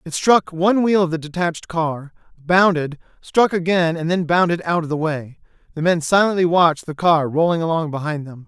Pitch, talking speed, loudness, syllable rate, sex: 165 Hz, 200 wpm, -18 LUFS, 5.3 syllables/s, male